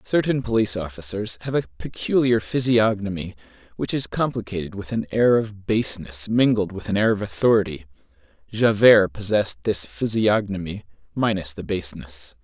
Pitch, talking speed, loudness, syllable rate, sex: 105 Hz, 135 wpm, -22 LUFS, 5.3 syllables/s, male